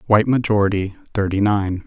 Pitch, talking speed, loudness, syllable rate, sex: 105 Hz, 130 wpm, -19 LUFS, 5.9 syllables/s, male